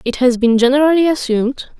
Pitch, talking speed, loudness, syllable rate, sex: 260 Hz, 170 wpm, -14 LUFS, 6.1 syllables/s, female